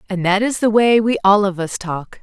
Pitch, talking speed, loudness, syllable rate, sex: 200 Hz, 270 wpm, -16 LUFS, 5.1 syllables/s, female